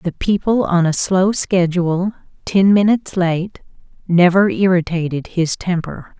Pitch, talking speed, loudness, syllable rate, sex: 180 Hz, 125 wpm, -16 LUFS, 4.3 syllables/s, female